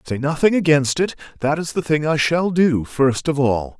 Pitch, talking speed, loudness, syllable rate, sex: 145 Hz, 220 wpm, -19 LUFS, 4.8 syllables/s, male